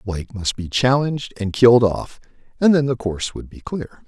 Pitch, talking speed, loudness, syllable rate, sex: 115 Hz, 205 wpm, -19 LUFS, 5.4 syllables/s, male